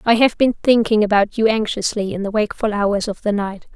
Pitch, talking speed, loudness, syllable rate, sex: 210 Hz, 225 wpm, -18 LUFS, 5.7 syllables/s, female